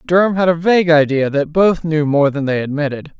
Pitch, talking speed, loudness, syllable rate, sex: 155 Hz, 225 wpm, -15 LUFS, 5.5 syllables/s, male